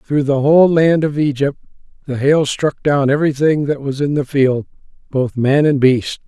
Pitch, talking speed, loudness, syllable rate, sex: 140 Hz, 190 wpm, -15 LUFS, 4.8 syllables/s, male